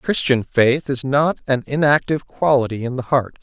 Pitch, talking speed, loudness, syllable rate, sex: 135 Hz, 175 wpm, -18 LUFS, 4.9 syllables/s, male